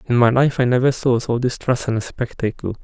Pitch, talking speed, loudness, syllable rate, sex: 120 Hz, 210 wpm, -19 LUFS, 5.5 syllables/s, male